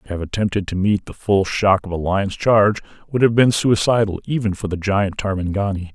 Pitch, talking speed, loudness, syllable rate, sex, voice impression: 100 Hz, 210 wpm, -19 LUFS, 5.5 syllables/s, male, very masculine, very adult-like, thick, cool, slightly calm, elegant, slightly kind